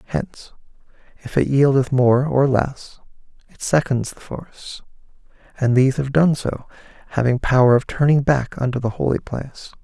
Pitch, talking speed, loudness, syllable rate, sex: 135 Hz, 155 wpm, -19 LUFS, 5.0 syllables/s, male